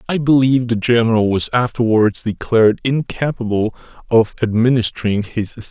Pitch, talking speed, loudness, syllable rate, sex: 115 Hz, 125 wpm, -16 LUFS, 5.7 syllables/s, male